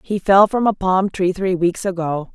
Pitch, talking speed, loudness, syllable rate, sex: 185 Hz, 230 wpm, -17 LUFS, 4.5 syllables/s, female